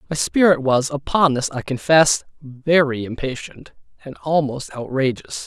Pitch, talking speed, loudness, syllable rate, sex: 140 Hz, 130 wpm, -19 LUFS, 4.4 syllables/s, male